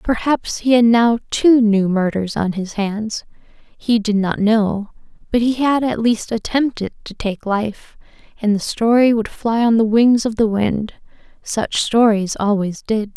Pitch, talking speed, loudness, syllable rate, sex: 220 Hz, 175 wpm, -17 LUFS, 4.0 syllables/s, female